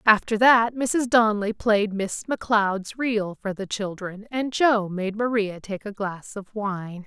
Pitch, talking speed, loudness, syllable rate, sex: 210 Hz, 170 wpm, -23 LUFS, 4.0 syllables/s, female